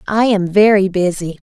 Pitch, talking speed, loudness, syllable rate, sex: 195 Hz, 165 wpm, -14 LUFS, 4.8 syllables/s, female